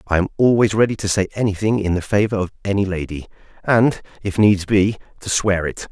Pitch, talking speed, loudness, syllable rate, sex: 100 Hz, 205 wpm, -18 LUFS, 5.8 syllables/s, male